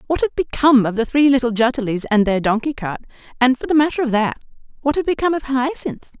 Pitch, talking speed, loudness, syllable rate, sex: 255 Hz, 225 wpm, -18 LUFS, 6.5 syllables/s, female